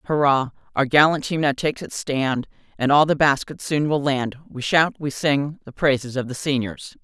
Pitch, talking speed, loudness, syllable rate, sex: 140 Hz, 205 wpm, -21 LUFS, 4.9 syllables/s, female